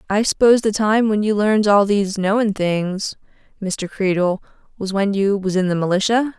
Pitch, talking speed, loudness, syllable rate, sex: 200 Hz, 190 wpm, -18 LUFS, 5.0 syllables/s, female